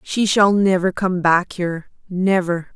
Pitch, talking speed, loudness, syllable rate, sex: 185 Hz, 130 wpm, -18 LUFS, 4.1 syllables/s, female